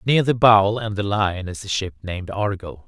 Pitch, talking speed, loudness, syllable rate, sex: 100 Hz, 230 wpm, -20 LUFS, 4.9 syllables/s, male